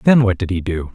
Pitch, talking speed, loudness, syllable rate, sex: 100 Hz, 315 wpm, -18 LUFS, 5.5 syllables/s, male